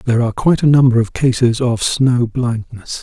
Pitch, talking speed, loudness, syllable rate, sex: 120 Hz, 200 wpm, -15 LUFS, 5.4 syllables/s, male